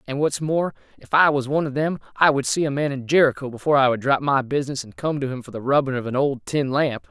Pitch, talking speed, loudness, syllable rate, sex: 140 Hz, 285 wpm, -21 LUFS, 6.4 syllables/s, male